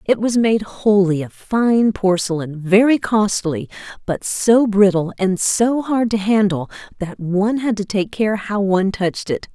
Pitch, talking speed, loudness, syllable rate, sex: 200 Hz, 170 wpm, -17 LUFS, 4.3 syllables/s, female